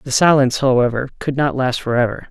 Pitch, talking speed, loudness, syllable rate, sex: 130 Hz, 180 wpm, -17 LUFS, 6.2 syllables/s, male